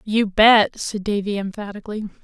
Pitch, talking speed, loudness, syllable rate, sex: 205 Hz, 135 wpm, -19 LUFS, 5.2 syllables/s, female